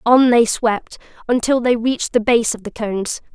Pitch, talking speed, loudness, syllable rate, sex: 235 Hz, 195 wpm, -17 LUFS, 4.9 syllables/s, female